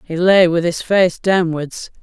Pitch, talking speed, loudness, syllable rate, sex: 175 Hz, 180 wpm, -15 LUFS, 3.8 syllables/s, female